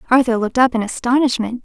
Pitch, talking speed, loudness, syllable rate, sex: 240 Hz, 185 wpm, -17 LUFS, 7.1 syllables/s, female